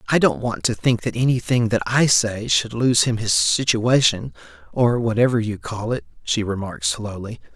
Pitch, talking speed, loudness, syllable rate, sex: 115 Hz, 175 wpm, -20 LUFS, 4.8 syllables/s, male